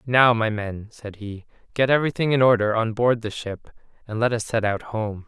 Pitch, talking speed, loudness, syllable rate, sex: 115 Hz, 215 wpm, -22 LUFS, 5.2 syllables/s, male